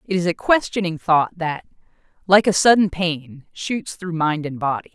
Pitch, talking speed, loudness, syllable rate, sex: 175 Hz, 180 wpm, -19 LUFS, 4.5 syllables/s, female